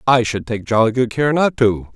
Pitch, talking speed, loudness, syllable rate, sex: 120 Hz, 245 wpm, -17 LUFS, 5.1 syllables/s, male